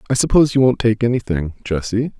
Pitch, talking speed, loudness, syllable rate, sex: 115 Hz, 165 wpm, -17 LUFS, 6.4 syllables/s, male